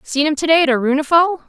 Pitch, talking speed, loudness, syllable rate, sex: 300 Hz, 245 wpm, -15 LUFS, 6.6 syllables/s, female